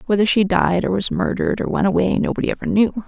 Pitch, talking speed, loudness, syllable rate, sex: 205 Hz, 235 wpm, -18 LUFS, 6.5 syllables/s, female